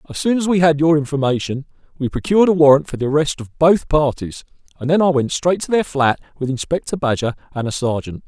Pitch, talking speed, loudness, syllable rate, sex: 150 Hz, 225 wpm, -17 LUFS, 6.1 syllables/s, male